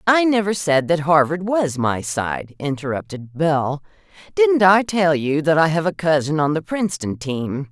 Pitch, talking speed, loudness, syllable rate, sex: 160 Hz, 180 wpm, -19 LUFS, 4.6 syllables/s, female